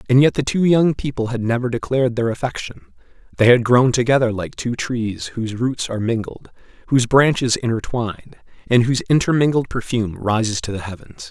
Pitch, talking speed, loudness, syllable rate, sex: 120 Hz, 175 wpm, -19 LUFS, 5.8 syllables/s, male